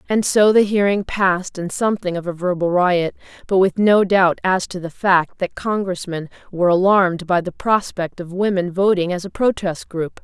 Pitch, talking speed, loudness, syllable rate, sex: 185 Hz, 195 wpm, -18 LUFS, 5.0 syllables/s, female